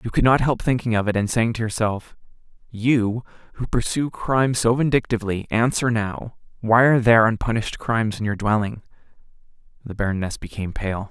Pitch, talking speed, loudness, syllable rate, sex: 110 Hz, 165 wpm, -21 LUFS, 5.7 syllables/s, male